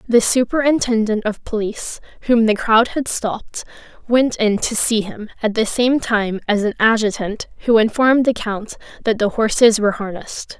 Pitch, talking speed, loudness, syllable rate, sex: 225 Hz, 170 wpm, -17 LUFS, 5.0 syllables/s, female